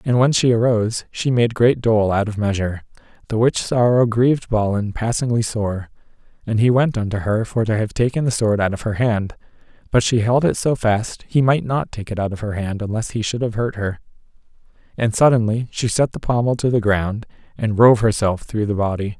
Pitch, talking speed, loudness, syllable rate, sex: 110 Hz, 215 wpm, -19 LUFS, 5.3 syllables/s, male